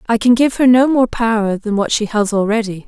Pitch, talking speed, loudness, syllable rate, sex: 225 Hz, 250 wpm, -14 LUFS, 5.6 syllables/s, female